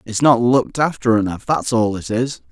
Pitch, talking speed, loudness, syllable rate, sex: 115 Hz, 190 wpm, -17 LUFS, 5.2 syllables/s, male